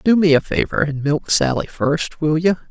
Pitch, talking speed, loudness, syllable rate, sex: 160 Hz, 220 wpm, -18 LUFS, 4.8 syllables/s, female